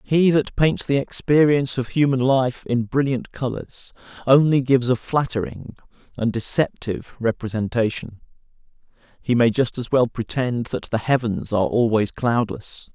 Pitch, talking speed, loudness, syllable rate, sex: 125 Hz, 135 wpm, -21 LUFS, 4.7 syllables/s, male